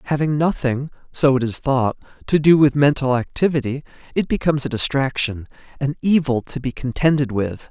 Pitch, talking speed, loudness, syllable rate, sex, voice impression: 140 Hz, 165 wpm, -19 LUFS, 5.4 syllables/s, male, masculine, adult-like, tensed, slightly powerful, bright, clear, slightly halting, intellectual, refreshing, friendly, slightly reassuring, slightly kind